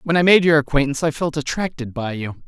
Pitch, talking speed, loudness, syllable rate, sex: 145 Hz, 245 wpm, -19 LUFS, 6.4 syllables/s, male